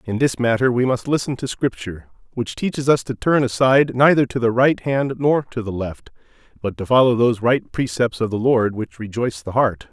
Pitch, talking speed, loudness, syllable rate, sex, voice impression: 120 Hz, 220 wpm, -19 LUFS, 5.5 syllables/s, male, masculine, slightly middle-aged, slightly thick, slightly tensed, slightly weak, bright, slightly soft, clear, fluent, slightly cool, intellectual, refreshing, very sincere, calm, slightly mature, friendly, reassuring, slightly unique, elegant, sweet, slightly lively, slightly kind, slightly intense, slightly modest